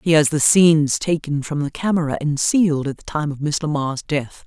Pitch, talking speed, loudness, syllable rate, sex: 150 Hz, 230 wpm, -19 LUFS, 5.3 syllables/s, female